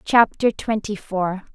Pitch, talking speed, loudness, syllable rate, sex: 205 Hz, 115 wpm, -21 LUFS, 3.7 syllables/s, female